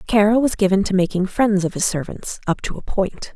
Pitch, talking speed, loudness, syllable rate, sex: 195 Hz, 215 wpm, -20 LUFS, 5.4 syllables/s, female